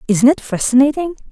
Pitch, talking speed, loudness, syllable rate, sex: 265 Hz, 135 wpm, -15 LUFS, 5.9 syllables/s, female